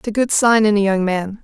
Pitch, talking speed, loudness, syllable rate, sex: 210 Hz, 335 wpm, -16 LUFS, 5.8 syllables/s, female